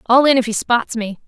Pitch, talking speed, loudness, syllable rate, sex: 235 Hz, 280 wpm, -16 LUFS, 5.5 syllables/s, female